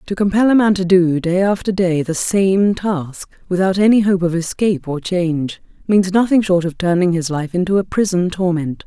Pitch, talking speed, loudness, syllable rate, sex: 185 Hz, 205 wpm, -16 LUFS, 5.0 syllables/s, female